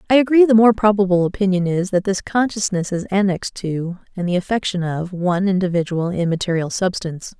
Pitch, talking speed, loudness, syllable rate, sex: 190 Hz, 170 wpm, -18 LUFS, 5.8 syllables/s, female